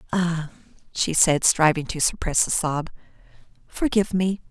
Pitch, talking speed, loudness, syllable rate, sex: 170 Hz, 135 wpm, -22 LUFS, 4.7 syllables/s, female